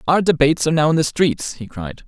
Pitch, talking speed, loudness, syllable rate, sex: 145 Hz, 260 wpm, -17 LUFS, 6.3 syllables/s, male